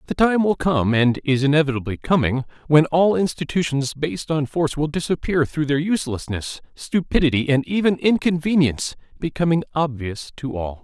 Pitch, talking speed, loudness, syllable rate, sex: 150 Hz, 150 wpm, -20 LUFS, 5.4 syllables/s, male